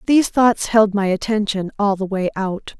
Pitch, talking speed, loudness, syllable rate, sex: 205 Hz, 195 wpm, -18 LUFS, 4.8 syllables/s, female